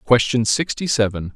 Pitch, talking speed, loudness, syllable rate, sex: 120 Hz, 135 wpm, -19 LUFS, 4.6 syllables/s, male